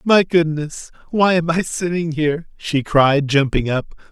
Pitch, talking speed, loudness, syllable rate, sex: 160 Hz, 160 wpm, -18 LUFS, 4.2 syllables/s, male